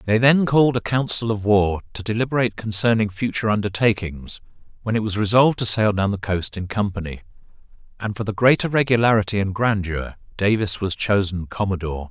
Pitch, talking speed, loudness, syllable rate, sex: 105 Hz, 170 wpm, -20 LUFS, 5.9 syllables/s, male